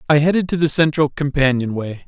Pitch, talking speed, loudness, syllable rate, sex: 145 Hz, 175 wpm, -17 LUFS, 6.0 syllables/s, male